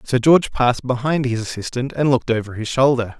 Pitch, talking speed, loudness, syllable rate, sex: 125 Hz, 205 wpm, -19 LUFS, 6.2 syllables/s, male